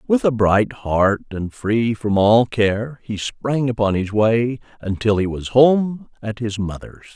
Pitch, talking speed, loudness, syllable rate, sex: 115 Hz, 175 wpm, -19 LUFS, 3.7 syllables/s, male